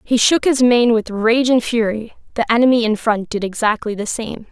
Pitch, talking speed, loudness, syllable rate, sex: 230 Hz, 210 wpm, -16 LUFS, 5.1 syllables/s, female